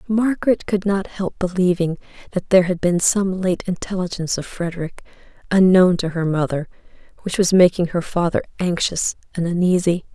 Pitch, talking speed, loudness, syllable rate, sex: 180 Hz, 155 wpm, -19 LUFS, 5.4 syllables/s, female